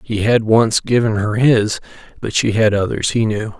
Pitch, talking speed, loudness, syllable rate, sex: 110 Hz, 200 wpm, -16 LUFS, 4.5 syllables/s, male